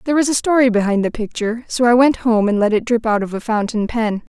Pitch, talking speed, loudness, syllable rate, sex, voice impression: 230 Hz, 275 wpm, -17 LUFS, 6.4 syllables/s, female, feminine, young, relaxed, bright, soft, muffled, cute, calm, friendly, reassuring, slightly elegant, kind, slightly modest